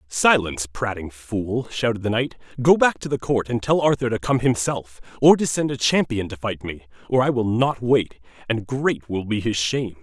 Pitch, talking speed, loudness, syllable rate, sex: 125 Hz, 215 wpm, -21 LUFS, 5.0 syllables/s, male